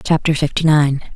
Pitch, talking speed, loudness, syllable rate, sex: 150 Hz, 155 wpm, -16 LUFS, 5.3 syllables/s, female